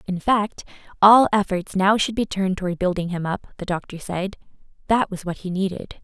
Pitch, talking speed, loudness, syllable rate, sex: 190 Hz, 200 wpm, -21 LUFS, 5.4 syllables/s, female